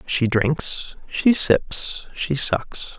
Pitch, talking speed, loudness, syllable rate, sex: 145 Hz, 120 wpm, -20 LUFS, 2.3 syllables/s, male